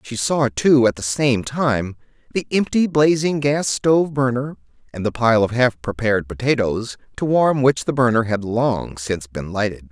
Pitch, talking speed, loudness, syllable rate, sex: 120 Hz, 180 wpm, -19 LUFS, 4.6 syllables/s, male